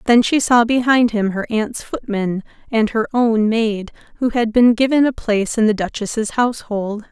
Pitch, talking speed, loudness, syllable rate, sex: 225 Hz, 185 wpm, -17 LUFS, 4.6 syllables/s, female